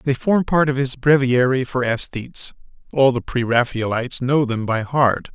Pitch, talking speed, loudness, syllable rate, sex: 130 Hz, 180 wpm, -19 LUFS, 4.8 syllables/s, male